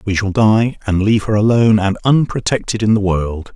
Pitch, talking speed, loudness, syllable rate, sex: 105 Hz, 205 wpm, -15 LUFS, 5.5 syllables/s, male